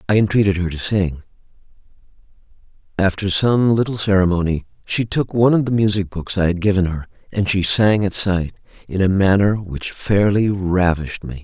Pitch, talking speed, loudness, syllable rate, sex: 95 Hz, 170 wpm, -18 LUFS, 5.3 syllables/s, male